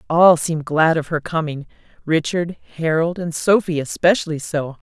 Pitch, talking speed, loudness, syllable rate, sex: 160 Hz, 150 wpm, -19 LUFS, 4.9 syllables/s, female